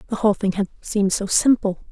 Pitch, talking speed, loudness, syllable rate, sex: 205 Hz, 220 wpm, -20 LUFS, 6.8 syllables/s, female